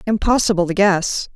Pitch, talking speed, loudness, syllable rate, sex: 195 Hz, 135 wpm, -17 LUFS, 5.2 syllables/s, female